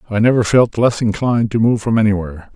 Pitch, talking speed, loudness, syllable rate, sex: 110 Hz, 210 wpm, -15 LUFS, 6.5 syllables/s, male